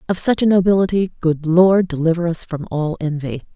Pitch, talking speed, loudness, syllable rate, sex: 170 Hz, 185 wpm, -17 LUFS, 5.3 syllables/s, female